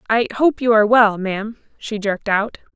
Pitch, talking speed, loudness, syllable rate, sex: 220 Hz, 195 wpm, -17 LUFS, 5.7 syllables/s, female